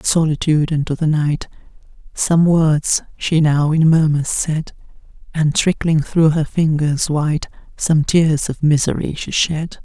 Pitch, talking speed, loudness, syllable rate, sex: 155 Hz, 150 wpm, -17 LUFS, 4.2 syllables/s, female